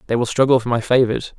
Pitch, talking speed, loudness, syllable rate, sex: 120 Hz, 260 wpm, -17 LUFS, 6.7 syllables/s, male